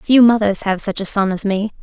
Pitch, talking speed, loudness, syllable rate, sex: 205 Hz, 265 wpm, -16 LUFS, 5.2 syllables/s, female